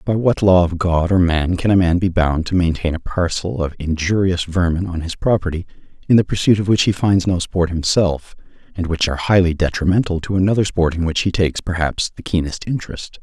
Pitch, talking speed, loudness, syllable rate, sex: 90 Hz, 220 wpm, -18 LUFS, 5.6 syllables/s, male